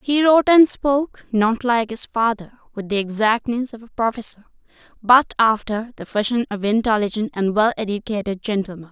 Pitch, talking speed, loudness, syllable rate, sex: 225 Hz, 160 wpm, -19 LUFS, 5.3 syllables/s, female